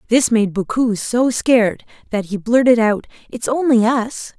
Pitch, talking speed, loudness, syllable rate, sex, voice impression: 230 Hz, 165 wpm, -17 LUFS, 4.4 syllables/s, female, very feminine, slightly middle-aged, very thin, tensed, powerful, bright, very hard, very clear, fluent, cool, very intellectual, refreshing, slightly sincere, slightly calm, slightly friendly, slightly reassuring, very unique, slightly elegant, very wild, slightly sweet, lively, strict, slightly intense